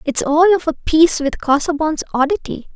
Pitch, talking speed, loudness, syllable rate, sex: 310 Hz, 175 wpm, -16 LUFS, 5.7 syllables/s, female